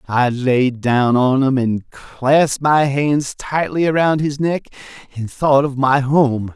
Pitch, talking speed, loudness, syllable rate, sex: 135 Hz, 165 wpm, -16 LUFS, 3.6 syllables/s, male